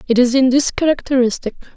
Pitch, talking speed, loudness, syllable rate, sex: 255 Hz, 170 wpm, -15 LUFS, 6.3 syllables/s, female